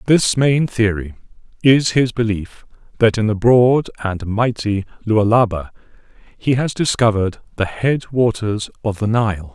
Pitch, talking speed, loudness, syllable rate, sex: 110 Hz, 140 wpm, -17 LUFS, 4.4 syllables/s, male